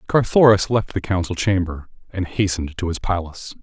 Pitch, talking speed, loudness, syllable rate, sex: 95 Hz, 165 wpm, -20 LUFS, 5.5 syllables/s, male